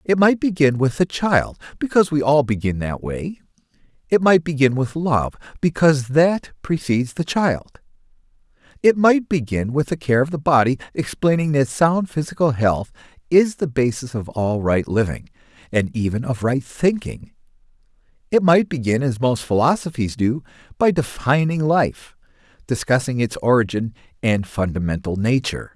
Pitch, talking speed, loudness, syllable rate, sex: 140 Hz, 150 wpm, -19 LUFS, 4.8 syllables/s, male